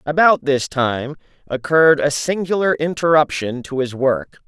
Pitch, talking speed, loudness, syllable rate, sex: 145 Hz, 135 wpm, -18 LUFS, 4.5 syllables/s, male